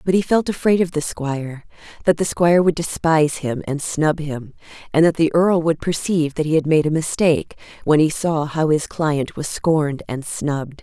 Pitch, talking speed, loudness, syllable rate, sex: 155 Hz, 205 wpm, -19 LUFS, 5.2 syllables/s, female